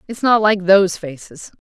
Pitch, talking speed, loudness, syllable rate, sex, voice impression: 195 Hz, 185 wpm, -14 LUFS, 5.1 syllables/s, female, very feminine, slightly young, slightly adult-like, thin, slightly tensed, slightly weak, slightly dark, hard, clear, fluent, slightly cute, cool, intellectual, refreshing, slightly sincere, slightly calm, friendly, reassuring, slightly unique, slightly elegant, slightly sweet, slightly lively, slightly strict, slightly sharp